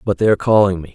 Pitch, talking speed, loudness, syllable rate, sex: 100 Hz, 315 wpm, -15 LUFS, 8.2 syllables/s, male